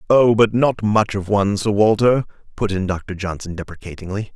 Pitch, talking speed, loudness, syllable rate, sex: 105 Hz, 180 wpm, -18 LUFS, 5.5 syllables/s, male